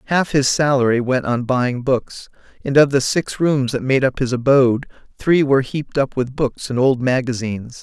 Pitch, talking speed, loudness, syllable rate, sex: 130 Hz, 200 wpm, -18 LUFS, 5.0 syllables/s, male